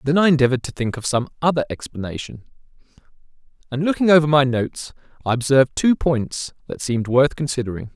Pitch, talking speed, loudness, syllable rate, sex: 140 Hz, 165 wpm, -20 LUFS, 6.4 syllables/s, male